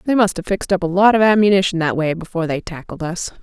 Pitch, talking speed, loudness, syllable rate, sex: 185 Hz, 260 wpm, -17 LUFS, 6.9 syllables/s, female